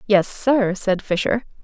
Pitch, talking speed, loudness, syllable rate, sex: 210 Hz, 145 wpm, -20 LUFS, 3.8 syllables/s, female